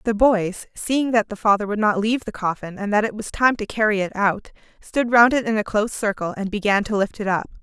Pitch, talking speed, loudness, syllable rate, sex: 210 Hz, 260 wpm, -21 LUFS, 5.7 syllables/s, female